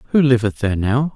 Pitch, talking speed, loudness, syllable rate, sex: 125 Hz, 205 wpm, -17 LUFS, 6.7 syllables/s, male